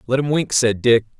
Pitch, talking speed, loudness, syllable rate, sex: 125 Hz, 250 wpm, -18 LUFS, 5.4 syllables/s, male